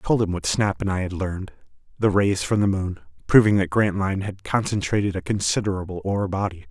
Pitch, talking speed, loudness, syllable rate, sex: 95 Hz, 205 wpm, -22 LUFS, 6.1 syllables/s, male